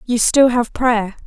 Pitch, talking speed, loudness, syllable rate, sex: 235 Hz, 190 wpm, -15 LUFS, 3.8 syllables/s, female